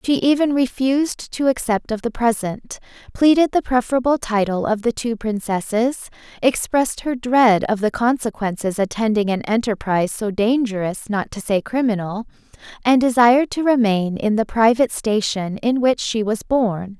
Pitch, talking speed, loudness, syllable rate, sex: 230 Hz, 155 wpm, -19 LUFS, 4.9 syllables/s, female